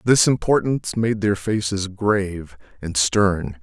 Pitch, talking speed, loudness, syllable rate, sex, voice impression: 100 Hz, 130 wpm, -20 LUFS, 3.9 syllables/s, male, masculine, middle-aged, thick, tensed, powerful, slightly hard, slightly muffled, slightly intellectual, calm, mature, reassuring, wild, kind